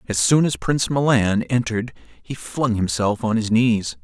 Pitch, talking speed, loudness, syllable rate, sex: 115 Hz, 180 wpm, -20 LUFS, 4.6 syllables/s, male